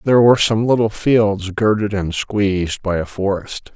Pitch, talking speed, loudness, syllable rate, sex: 100 Hz, 175 wpm, -17 LUFS, 4.7 syllables/s, male